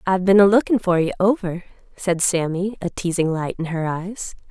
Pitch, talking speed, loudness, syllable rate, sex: 185 Hz, 200 wpm, -20 LUFS, 5.3 syllables/s, female